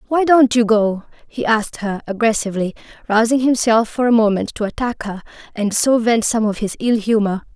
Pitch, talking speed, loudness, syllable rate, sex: 225 Hz, 190 wpm, -17 LUFS, 5.4 syllables/s, female